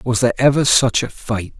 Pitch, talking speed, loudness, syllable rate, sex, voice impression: 120 Hz, 225 wpm, -16 LUFS, 5.4 syllables/s, male, very masculine, very adult-like, thick, cool, sincere, slightly calm, slightly wild